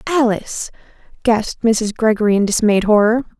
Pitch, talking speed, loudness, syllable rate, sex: 220 Hz, 125 wpm, -16 LUFS, 5.4 syllables/s, female